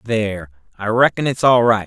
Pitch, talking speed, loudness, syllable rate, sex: 110 Hz, 195 wpm, -17 LUFS, 5.1 syllables/s, male